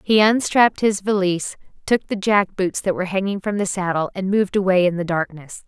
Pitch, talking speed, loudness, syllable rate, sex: 190 Hz, 210 wpm, -20 LUFS, 5.7 syllables/s, female